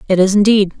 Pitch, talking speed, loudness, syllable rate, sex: 195 Hz, 225 wpm, -12 LUFS, 6.9 syllables/s, female